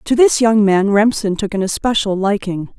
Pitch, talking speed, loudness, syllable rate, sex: 210 Hz, 195 wpm, -15 LUFS, 4.9 syllables/s, female